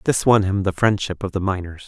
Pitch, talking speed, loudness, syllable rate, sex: 95 Hz, 255 wpm, -20 LUFS, 5.8 syllables/s, male